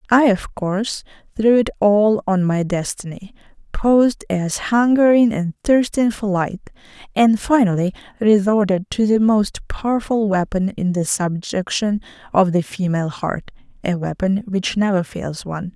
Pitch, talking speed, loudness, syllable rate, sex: 200 Hz, 140 wpm, -18 LUFS, 4.4 syllables/s, female